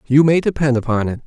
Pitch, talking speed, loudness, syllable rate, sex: 140 Hz, 235 wpm, -16 LUFS, 6.3 syllables/s, male